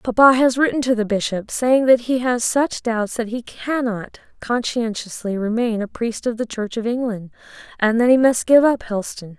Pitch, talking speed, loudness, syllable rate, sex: 235 Hz, 200 wpm, -19 LUFS, 4.9 syllables/s, female